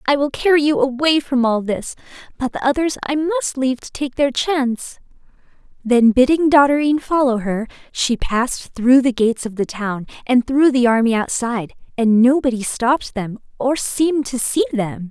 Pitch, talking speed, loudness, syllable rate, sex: 255 Hz, 180 wpm, -17 LUFS, 5.1 syllables/s, female